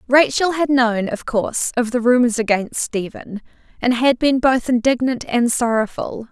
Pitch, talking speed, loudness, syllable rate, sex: 245 Hz, 160 wpm, -18 LUFS, 4.6 syllables/s, female